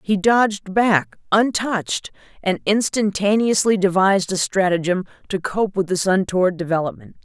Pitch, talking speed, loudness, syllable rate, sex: 195 Hz, 125 wpm, -19 LUFS, 4.9 syllables/s, female